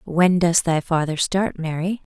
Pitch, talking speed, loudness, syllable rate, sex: 170 Hz, 165 wpm, -20 LUFS, 4.2 syllables/s, female